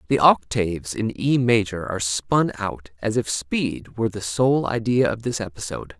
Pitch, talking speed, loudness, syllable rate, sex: 110 Hz, 180 wpm, -22 LUFS, 4.8 syllables/s, male